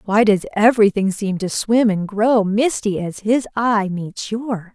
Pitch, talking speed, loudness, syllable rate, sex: 210 Hz, 175 wpm, -18 LUFS, 4.1 syllables/s, female